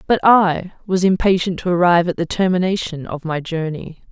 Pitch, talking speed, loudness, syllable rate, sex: 175 Hz, 175 wpm, -17 LUFS, 5.4 syllables/s, female